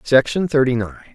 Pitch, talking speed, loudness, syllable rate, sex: 135 Hz, 155 wpm, -18 LUFS, 5.8 syllables/s, male